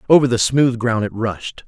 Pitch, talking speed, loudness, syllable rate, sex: 120 Hz, 215 wpm, -17 LUFS, 4.7 syllables/s, male